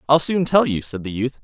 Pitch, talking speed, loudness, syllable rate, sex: 135 Hz, 295 wpm, -19 LUFS, 5.6 syllables/s, male